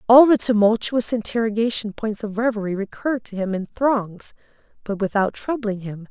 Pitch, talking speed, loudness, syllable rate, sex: 220 Hz, 155 wpm, -21 LUFS, 5.2 syllables/s, female